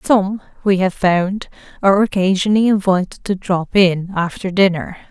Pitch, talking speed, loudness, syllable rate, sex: 190 Hz, 140 wpm, -16 LUFS, 4.9 syllables/s, female